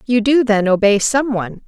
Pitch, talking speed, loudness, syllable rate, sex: 225 Hz, 215 wpm, -15 LUFS, 5.2 syllables/s, female